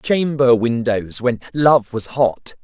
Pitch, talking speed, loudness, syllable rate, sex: 125 Hz, 135 wpm, -17 LUFS, 3.4 syllables/s, male